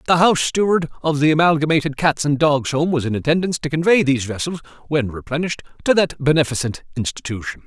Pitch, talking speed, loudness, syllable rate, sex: 150 Hz, 170 wpm, -19 LUFS, 6.7 syllables/s, male